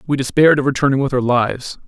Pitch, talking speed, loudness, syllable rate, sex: 135 Hz, 225 wpm, -16 LUFS, 7.1 syllables/s, male